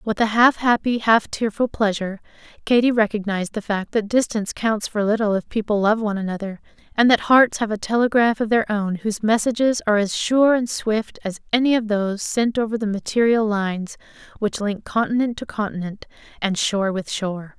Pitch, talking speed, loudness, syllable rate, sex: 215 Hz, 190 wpm, -20 LUFS, 5.6 syllables/s, female